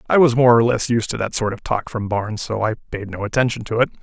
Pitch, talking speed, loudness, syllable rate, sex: 115 Hz, 300 wpm, -19 LUFS, 6.2 syllables/s, male